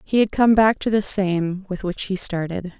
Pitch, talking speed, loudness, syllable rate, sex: 195 Hz, 235 wpm, -20 LUFS, 4.6 syllables/s, female